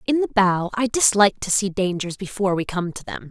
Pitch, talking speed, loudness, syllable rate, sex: 200 Hz, 235 wpm, -20 LUFS, 5.8 syllables/s, female